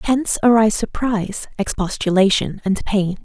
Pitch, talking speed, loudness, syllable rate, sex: 210 Hz, 110 wpm, -18 LUFS, 5.1 syllables/s, female